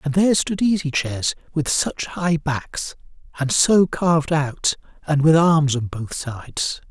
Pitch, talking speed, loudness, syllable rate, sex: 155 Hz, 165 wpm, -20 LUFS, 4.0 syllables/s, male